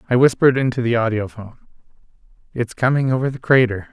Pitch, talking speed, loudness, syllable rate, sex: 120 Hz, 155 wpm, -18 LUFS, 7.0 syllables/s, male